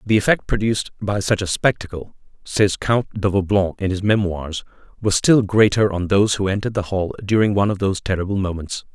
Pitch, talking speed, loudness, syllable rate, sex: 100 Hz, 195 wpm, -19 LUFS, 5.8 syllables/s, male